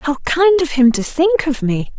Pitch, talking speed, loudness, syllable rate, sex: 270 Hz, 240 wpm, -15 LUFS, 4.4 syllables/s, female